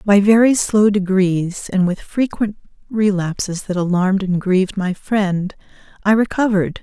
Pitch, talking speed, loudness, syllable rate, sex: 195 Hz, 140 wpm, -17 LUFS, 4.6 syllables/s, female